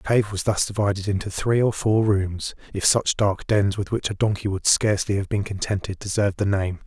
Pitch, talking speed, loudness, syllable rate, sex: 100 Hz, 225 wpm, -22 LUFS, 5.4 syllables/s, male